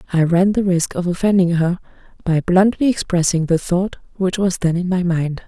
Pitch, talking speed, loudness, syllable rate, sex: 180 Hz, 195 wpm, -17 LUFS, 5.1 syllables/s, female